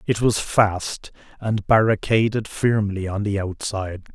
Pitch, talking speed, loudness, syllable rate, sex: 105 Hz, 130 wpm, -21 LUFS, 4.1 syllables/s, male